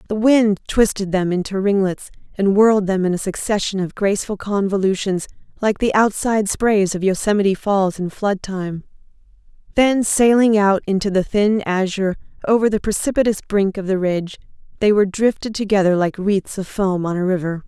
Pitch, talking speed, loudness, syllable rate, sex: 200 Hz, 170 wpm, -18 LUFS, 5.3 syllables/s, female